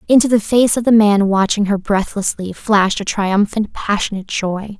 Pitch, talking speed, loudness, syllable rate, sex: 205 Hz, 175 wpm, -16 LUFS, 5.0 syllables/s, female